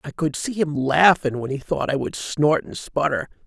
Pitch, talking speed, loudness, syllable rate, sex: 150 Hz, 225 wpm, -21 LUFS, 4.7 syllables/s, male